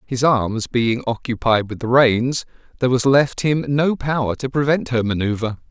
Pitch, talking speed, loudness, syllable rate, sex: 125 Hz, 180 wpm, -19 LUFS, 4.7 syllables/s, male